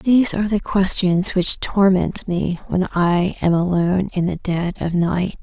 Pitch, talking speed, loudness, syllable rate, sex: 185 Hz, 175 wpm, -19 LUFS, 4.2 syllables/s, female